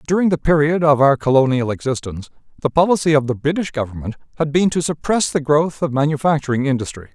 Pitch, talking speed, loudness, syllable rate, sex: 145 Hz, 185 wpm, -17 LUFS, 6.4 syllables/s, male